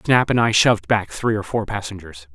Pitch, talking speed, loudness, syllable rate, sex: 105 Hz, 230 wpm, -19 LUFS, 5.4 syllables/s, male